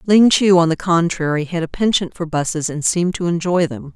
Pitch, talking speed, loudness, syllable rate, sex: 170 Hz, 225 wpm, -17 LUFS, 5.5 syllables/s, female